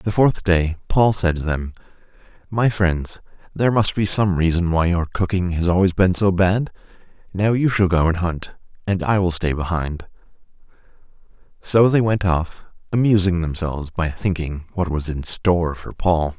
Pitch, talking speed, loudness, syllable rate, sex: 90 Hz, 170 wpm, -20 LUFS, 4.7 syllables/s, male